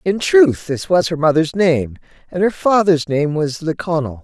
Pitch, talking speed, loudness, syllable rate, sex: 170 Hz, 185 wpm, -16 LUFS, 4.5 syllables/s, female